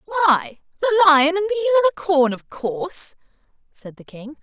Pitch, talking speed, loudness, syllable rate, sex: 325 Hz, 150 wpm, -18 LUFS, 5.1 syllables/s, female